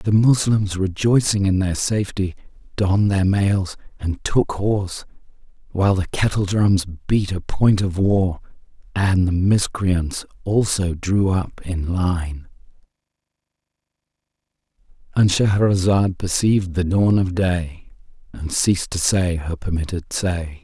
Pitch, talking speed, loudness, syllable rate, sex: 95 Hz, 120 wpm, -20 LUFS, 4.0 syllables/s, male